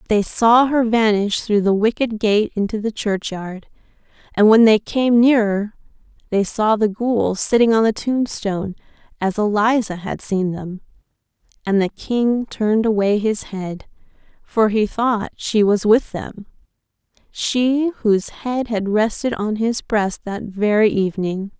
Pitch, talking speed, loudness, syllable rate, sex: 215 Hz, 145 wpm, -18 LUFS, 4.1 syllables/s, female